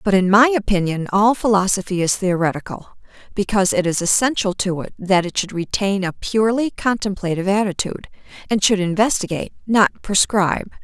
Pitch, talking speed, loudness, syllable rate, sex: 200 Hz, 150 wpm, -18 LUFS, 5.7 syllables/s, female